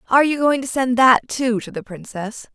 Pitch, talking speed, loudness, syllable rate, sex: 245 Hz, 235 wpm, -18 LUFS, 5.2 syllables/s, female